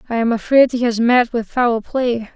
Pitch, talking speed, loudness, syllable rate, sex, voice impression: 235 Hz, 230 wpm, -16 LUFS, 4.7 syllables/s, female, feminine, slightly adult-like, slightly muffled, slightly cute, slightly unique, slightly strict